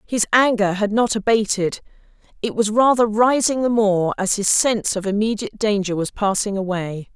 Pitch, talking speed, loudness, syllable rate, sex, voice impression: 210 Hz, 170 wpm, -19 LUFS, 5.1 syllables/s, female, very feminine, very adult-like, thin, tensed, powerful, slightly bright, hard, very clear, fluent, slightly raspy, cool, very intellectual, refreshing, slightly sincere, calm, friendly, reassuring, very unique, elegant, wild, slightly sweet, lively, very strict, intense, slightly sharp, light